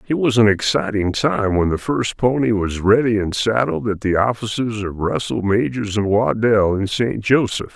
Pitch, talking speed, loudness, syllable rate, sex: 110 Hz, 185 wpm, -18 LUFS, 4.6 syllables/s, male